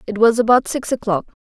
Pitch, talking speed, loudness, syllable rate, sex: 225 Hz, 210 wpm, -17 LUFS, 5.9 syllables/s, female